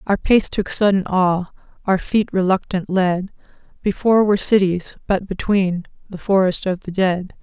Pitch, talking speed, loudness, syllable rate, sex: 190 Hz, 155 wpm, -18 LUFS, 4.6 syllables/s, female